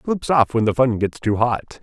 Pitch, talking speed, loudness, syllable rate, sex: 120 Hz, 265 wpm, -19 LUFS, 4.6 syllables/s, male